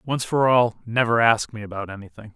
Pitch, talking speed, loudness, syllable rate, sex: 110 Hz, 205 wpm, -21 LUFS, 5.6 syllables/s, male